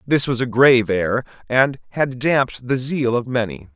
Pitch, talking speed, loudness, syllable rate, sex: 125 Hz, 190 wpm, -19 LUFS, 5.0 syllables/s, male